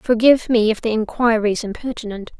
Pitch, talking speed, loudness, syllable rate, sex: 225 Hz, 175 wpm, -18 LUFS, 6.1 syllables/s, female